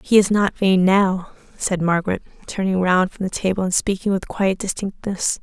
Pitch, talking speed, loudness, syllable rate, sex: 190 Hz, 190 wpm, -20 LUFS, 5.0 syllables/s, female